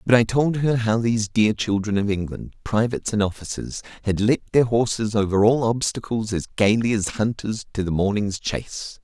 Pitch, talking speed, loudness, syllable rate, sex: 110 Hz, 185 wpm, -22 LUFS, 5.2 syllables/s, male